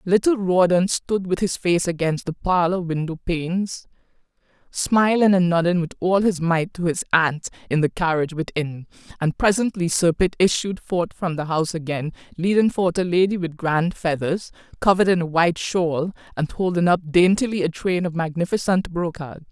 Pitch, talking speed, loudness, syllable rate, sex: 175 Hz, 170 wpm, -21 LUFS, 5.1 syllables/s, female